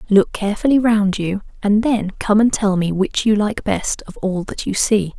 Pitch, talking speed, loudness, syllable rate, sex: 205 Hz, 220 wpm, -18 LUFS, 4.6 syllables/s, female